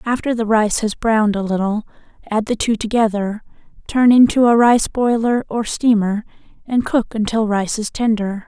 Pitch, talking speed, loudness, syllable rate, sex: 220 Hz, 170 wpm, -17 LUFS, 4.9 syllables/s, female